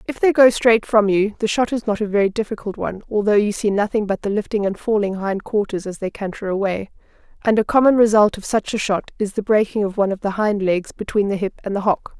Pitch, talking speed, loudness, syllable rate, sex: 205 Hz, 255 wpm, -19 LUFS, 6.0 syllables/s, female